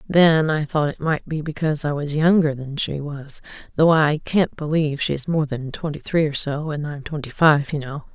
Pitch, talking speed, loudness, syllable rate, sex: 150 Hz, 230 wpm, -21 LUFS, 5.0 syllables/s, female